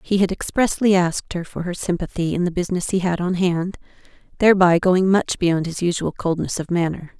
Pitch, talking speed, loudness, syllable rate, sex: 180 Hz, 190 wpm, -20 LUFS, 5.6 syllables/s, female